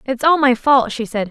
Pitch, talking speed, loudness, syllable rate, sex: 255 Hz, 275 wpm, -15 LUFS, 5.0 syllables/s, female